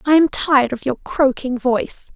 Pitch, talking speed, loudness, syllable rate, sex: 270 Hz, 195 wpm, -18 LUFS, 5.0 syllables/s, female